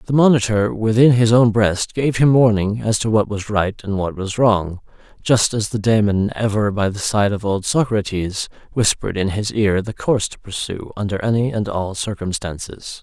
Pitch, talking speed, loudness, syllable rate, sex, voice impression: 105 Hz, 195 wpm, -18 LUFS, 4.8 syllables/s, male, very masculine, adult-like, slightly cool, slightly calm, slightly reassuring, slightly kind